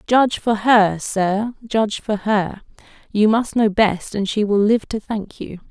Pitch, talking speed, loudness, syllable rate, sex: 210 Hz, 190 wpm, -19 LUFS, 4.1 syllables/s, female